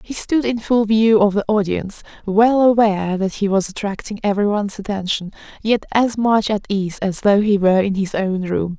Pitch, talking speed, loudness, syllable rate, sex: 205 Hz, 200 wpm, -18 LUFS, 5.2 syllables/s, female